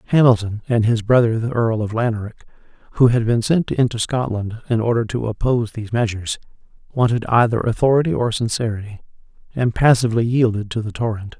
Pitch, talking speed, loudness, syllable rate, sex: 115 Hz, 165 wpm, -19 LUFS, 6.2 syllables/s, male